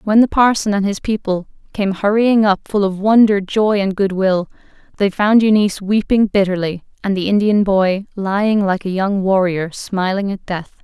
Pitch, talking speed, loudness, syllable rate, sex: 200 Hz, 185 wpm, -16 LUFS, 4.8 syllables/s, female